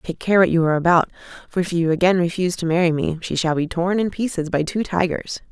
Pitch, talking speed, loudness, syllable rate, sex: 175 Hz, 250 wpm, -20 LUFS, 6.3 syllables/s, female